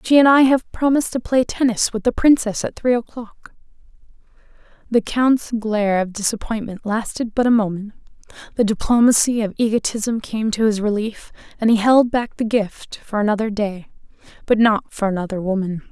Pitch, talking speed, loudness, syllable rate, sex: 220 Hz, 170 wpm, -19 LUFS, 5.2 syllables/s, female